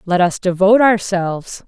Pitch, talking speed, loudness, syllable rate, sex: 190 Hz, 145 wpm, -15 LUFS, 5.2 syllables/s, female